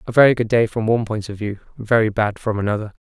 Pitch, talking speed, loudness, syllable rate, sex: 110 Hz, 260 wpm, -19 LUFS, 6.8 syllables/s, male